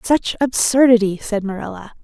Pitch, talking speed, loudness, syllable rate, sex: 230 Hz, 120 wpm, -16 LUFS, 5.1 syllables/s, female